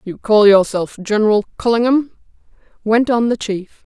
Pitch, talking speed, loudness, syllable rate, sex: 220 Hz, 135 wpm, -15 LUFS, 5.0 syllables/s, female